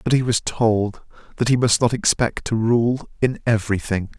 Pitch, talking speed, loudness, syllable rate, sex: 115 Hz, 200 wpm, -20 LUFS, 4.8 syllables/s, male